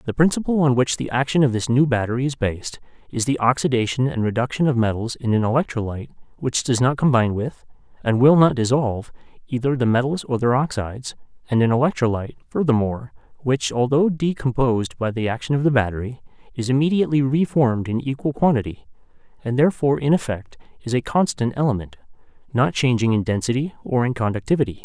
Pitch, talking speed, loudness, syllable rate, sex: 125 Hz, 170 wpm, -21 LUFS, 6.4 syllables/s, male